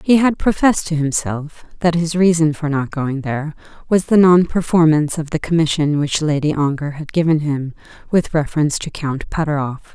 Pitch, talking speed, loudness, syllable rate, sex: 155 Hz, 180 wpm, -17 LUFS, 5.4 syllables/s, female